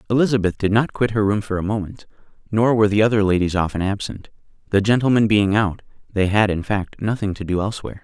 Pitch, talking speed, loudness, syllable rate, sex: 105 Hz, 210 wpm, -19 LUFS, 6.4 syllables/s, male